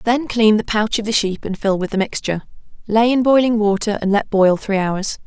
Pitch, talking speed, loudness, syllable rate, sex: 210 Hz, 240 wpm, -17 LUFS, 5.4 syllables/s, female